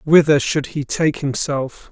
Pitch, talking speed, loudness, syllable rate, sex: 145 Hz, 155 wpm, -18 LUFS, 3.9 syllables/s, male